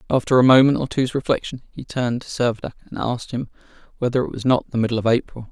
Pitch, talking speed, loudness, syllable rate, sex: 125 Hz, 230 wpm, -20 LUFS, 7.0 syllables/s, male